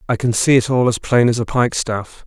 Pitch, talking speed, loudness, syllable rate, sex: 120 Hz, 265 wpm, -17 LUFS, 5.7 syllables/s, male